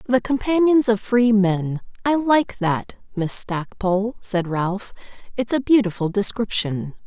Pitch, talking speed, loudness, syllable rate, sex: 215 Hz, 120 wpm, -20 LUFS, 4.0 syllables/s, female